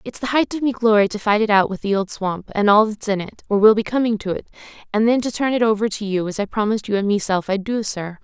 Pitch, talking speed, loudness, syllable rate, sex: 215 Hz, 305 wpm, -19 LUFS, 6.3 syllables/s, female